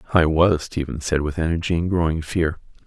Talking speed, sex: 190 wpm, male